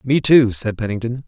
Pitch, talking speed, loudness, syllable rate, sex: 125 Hz, 190 wpm, -17 LUFS, 5.1 syllables/s, male